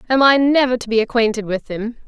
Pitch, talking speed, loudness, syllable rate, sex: 235 Hz, 230 wpm, -17 LUFS, 6.1 syllables/s, female